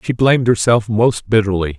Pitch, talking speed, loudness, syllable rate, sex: 110 Hz, 170 wpm, -15 LUFS, 5.4 syllables/s, male